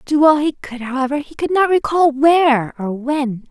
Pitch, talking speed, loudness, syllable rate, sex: 280 Hz, 205 wpm, -16 LUFS, 4.8 syllables/s, female